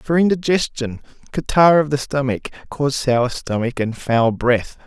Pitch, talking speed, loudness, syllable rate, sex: 135 Hz, 150 wpm, -19 LUFS, 3.8 syllables/s, male